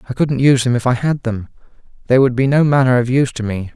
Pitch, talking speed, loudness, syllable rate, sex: 130 Hz, 270 wpm, -15 LUFS, 6.7 syllables/s, male